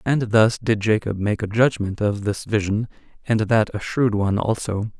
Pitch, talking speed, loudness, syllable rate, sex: 105 Hz, 190 wpm, -21 LUFS, 4.6 syllables/s, male